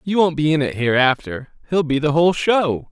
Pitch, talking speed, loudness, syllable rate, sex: 150 Hz, 225 wpm, -18 LUFS, 5.3 syllables/s, male